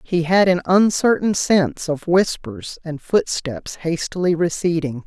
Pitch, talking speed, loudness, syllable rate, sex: 170 Hz, 130 wpm, -19 LUFS, 4.1 syllables/s, female